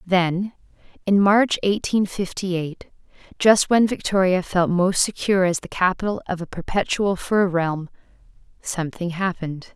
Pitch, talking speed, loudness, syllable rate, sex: 185 Hz, 135 wpm, -21 LUFS, 4.6 syllables/s, female